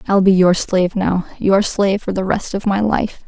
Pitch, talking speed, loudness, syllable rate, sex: 190 Hz, 240 wpm, -16 LUFS, 5.0 syllables/s, female